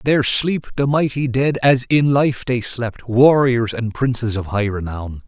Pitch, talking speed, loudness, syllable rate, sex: 125 Hz, 180 wpm, -18 LUFS, 4.2 syllables/s, male